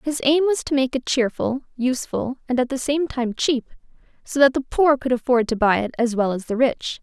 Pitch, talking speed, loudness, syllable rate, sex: 260 Hz, 240 wpm, -21 LUFS, 5.3 syllables/s, female